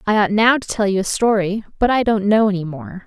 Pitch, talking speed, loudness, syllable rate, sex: 210 Hz, 275 wpm, -17 LUFS, 5.8 syllables/s, female